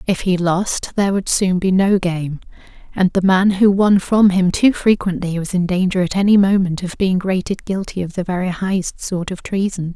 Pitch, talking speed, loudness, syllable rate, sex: 185 Hz, 210 wpm, -17 LUFS, 5.0 syllables/s, female